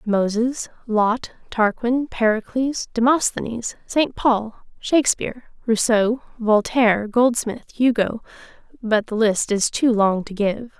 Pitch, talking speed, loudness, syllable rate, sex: 230 Hz, 105 wpm, -20 LUFS, 3.9 syllables/s, female